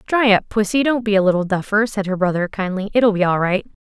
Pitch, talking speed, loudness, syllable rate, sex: 205 Hz, 250 wpm, -18 LUFS, 6.1 syllables/s, female